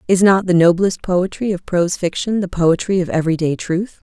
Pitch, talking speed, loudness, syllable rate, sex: 180 Hz, 205 wpm, -17 LUFS, 5.4 syllables/s, female